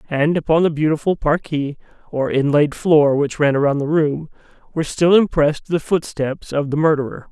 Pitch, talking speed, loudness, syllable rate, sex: 150 Hz, 170 wpm, -18 LUFS, 5.1 syllables/s, male